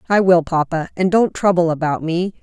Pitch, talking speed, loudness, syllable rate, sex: 175 Hz, 200 wpm, -17 LUFS, 5.3 syllables/s, female